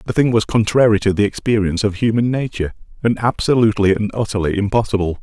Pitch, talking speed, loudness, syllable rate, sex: 105 Hz, 170 wpm, -17 LUFS, 6.7 syllables/s, male